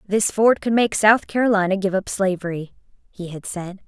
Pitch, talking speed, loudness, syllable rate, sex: 200 Hz, 185 wpm, -19 LUFS, 5.2 syllables/s, female